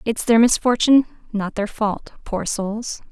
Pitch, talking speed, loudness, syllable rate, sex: 220 Hz, 155 wpm, -19 LUFS, 4.3 syllables/s, female